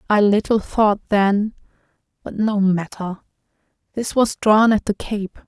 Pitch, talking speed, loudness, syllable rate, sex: 205 Hz, 130 wpm, -19 LUFS, 4.0 syllables/s, female